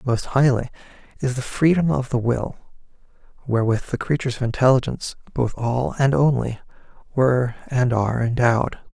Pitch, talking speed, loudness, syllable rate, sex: 125 Hz, 140 wpm, -21 LUFS, 5.4 syllables/s, male